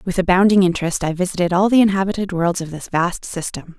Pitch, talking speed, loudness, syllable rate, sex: 180 Hz, 205 wpm, -18 LUFS, 6.2 syllables/s, female